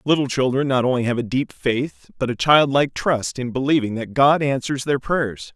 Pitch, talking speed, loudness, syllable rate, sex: 130 Hz, 205 wpm, -20 LUFS, 5.1 syllables/s, male